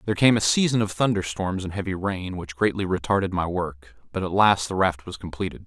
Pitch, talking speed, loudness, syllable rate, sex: 95 Hz, 235 wpm, -24 LUFS, 5.8 syllables/s, male